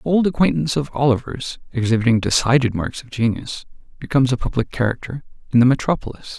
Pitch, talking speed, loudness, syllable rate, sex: 130 Hz, 160 wpm, -19 LUFS, 6.5 syllables/s, male